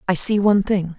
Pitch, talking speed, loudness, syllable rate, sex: 190 Hz, 245 wpm, -17 LUFS, 6.0 syllables/s, female